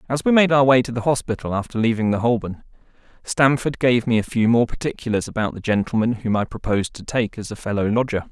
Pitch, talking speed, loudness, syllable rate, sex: 120 Hz, 225 wpm, -20 LUFS, 6.3 syllables/s, male